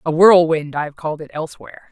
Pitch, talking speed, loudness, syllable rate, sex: 160 Hz, 220 wpm, -16 LUFS, 6.7 syllables/s, female